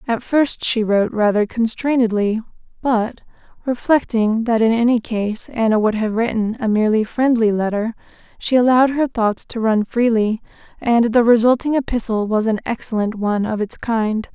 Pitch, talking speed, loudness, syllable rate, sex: 225 Hz, 160 wpm, -18 LUFS, 5.0 syllables/s, female